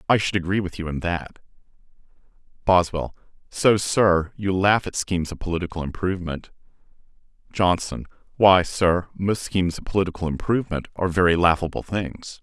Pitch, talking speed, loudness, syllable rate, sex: 90 Hz, 140 wpm, -22 LUFS, 5.4 syllables/s, male